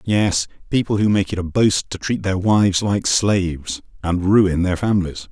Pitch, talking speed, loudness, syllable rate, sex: 95 Hz, 190 wpm, -19 LUFS, 4.6 syllables/s, male